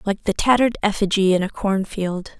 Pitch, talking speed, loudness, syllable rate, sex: 200 Hz, 175 wpm, -20 LUFS, 5.4 syllables/s, female